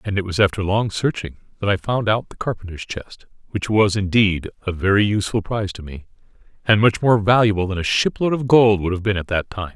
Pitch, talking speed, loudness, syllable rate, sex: 100 Hz, 235 wpm, -19 LUFS, 5.8 syllables/s, male